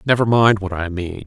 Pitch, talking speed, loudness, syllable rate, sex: 100 Hz, 240 wpm, -17 LUFS, 5.1 syllables/s, male